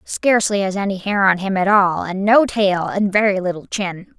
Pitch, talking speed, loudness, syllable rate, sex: 195 Hz, 215 wpm, -17 LUFS, 5.0 syllables/s, female